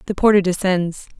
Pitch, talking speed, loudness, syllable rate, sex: 190 Hz, 150 wpm, -18 LUFS, 5.4 syllables/s, female